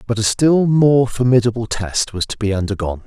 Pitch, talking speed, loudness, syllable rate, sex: 115 Hz, 195 wpm, -16 LUFS, 5.5 syllables/s, male